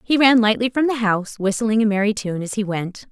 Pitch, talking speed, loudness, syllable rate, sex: 220 Hz, 250 wpm, -19 LUFS, 5.7 syllables/s, female